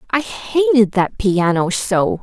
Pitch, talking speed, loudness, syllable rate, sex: 220 Hz, 135 wpm, -16 LUFS, 3.5 syllables/s, female